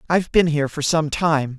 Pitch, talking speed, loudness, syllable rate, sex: 155 Hz, 225 wpm, -19 LUFS, 5.7 syllables/s, male